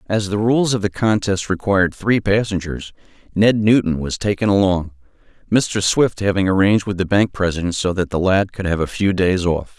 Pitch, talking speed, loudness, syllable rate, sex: 95 Hz, 195 wpm, -18 LUFS, 5.2 syllables/s, male